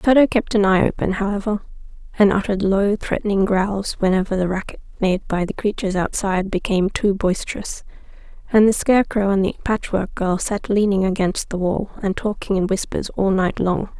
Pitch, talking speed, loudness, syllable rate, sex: 195 Hz, 175 wpm, -20 LUFS, 5.5 syllables/s, female